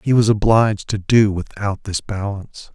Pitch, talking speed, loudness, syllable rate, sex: 105 Hz, 175 wpm, -18 LUFS, 4.9 syllables/s, male